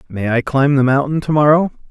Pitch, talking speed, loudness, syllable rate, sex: 140 Hz, 190 wpm, -15 LUFS, 5.8 syllables/s, male